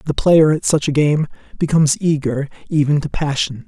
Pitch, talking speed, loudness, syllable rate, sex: 150 Hz, 180 wpm, -17 LUFS, 5.2 syllables/s, male